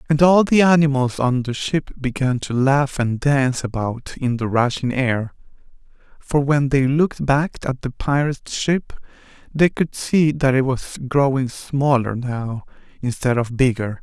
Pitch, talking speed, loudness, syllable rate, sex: 135 Hz, 165 wpm, -19 LUFS, 4.3 syllables/s, male